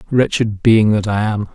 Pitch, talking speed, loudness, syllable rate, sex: 110 Hz, 195 wpm, -15 LUFS, 4.6 syllables/s, male